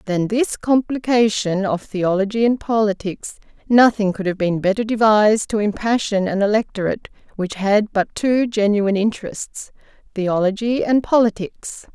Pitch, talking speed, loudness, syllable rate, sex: 210 Hz, 130 wpm, -18 LUFS, 4.8 syllables/s, female